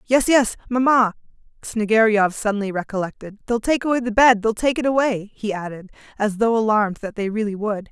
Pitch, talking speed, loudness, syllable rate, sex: 220 Hz, 180 wpm, -20 LUFS, 5.6 syllables/s, female